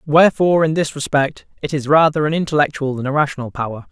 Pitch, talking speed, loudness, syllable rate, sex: 145 Hz, 200 wpm, -17 LUFS, 6.6 syllables/s, male